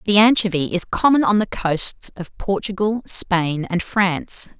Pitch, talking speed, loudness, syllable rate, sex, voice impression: 195 Hz, 155 wpm, -19 LUFS, 4.1 syllables/s, female, feminine, adult-like, tensed, powerful, hard, clear, slightly nasal, intellectual, slightly friendly, unique, slightly elegant, lively, strict, sharp